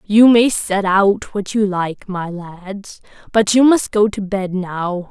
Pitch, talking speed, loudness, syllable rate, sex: 200 Hz, 190 wpm, -16 LUFS, 3.5 syllables/s, female